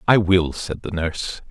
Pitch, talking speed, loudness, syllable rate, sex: 90 Hz, 200 wpm, -21 LUFS, 4.6 syllables/s, male